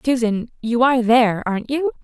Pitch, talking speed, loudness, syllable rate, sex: 240 Hz, 175 wpm, -18 LUFS, 5.9 syllables/s, female